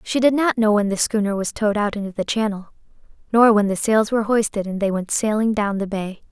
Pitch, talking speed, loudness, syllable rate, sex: 210 Hz, 245 wpm, -20 LUFS, 6.0 syllables/s, female